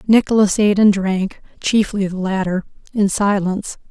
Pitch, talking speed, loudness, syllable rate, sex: 200 Hz, 140 wpm, -17 LUFS, 4.4 syllables/s, female